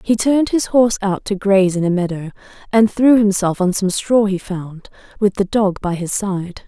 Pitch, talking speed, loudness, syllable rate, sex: 200 Hz, 215 wpm, -17 LUFS, 5.0 syllables/s, female